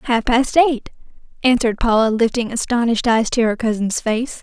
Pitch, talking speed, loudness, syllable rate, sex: 235 Hz, 165 wpm, -17 LUFS, 5.4 syllables/s, female